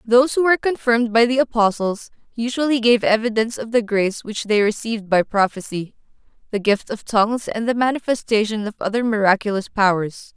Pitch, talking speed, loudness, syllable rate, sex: 220 Hz, 170 wpm, -19 LUFS, 5.8 syllables/s, female